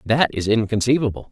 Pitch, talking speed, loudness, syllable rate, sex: 115 Hz, 135 wpm, -19 LUFS, 5.9 syllables/s, male